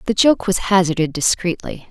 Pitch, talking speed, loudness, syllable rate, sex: 185 Hz, 155 wpm, -17 LUFS, 5.1 syllables/s, female